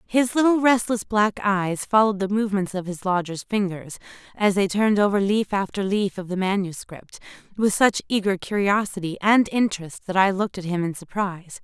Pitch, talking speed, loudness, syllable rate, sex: 200 Hz, 180 wpm, -22 LUFS, 5.4 syllables/s, female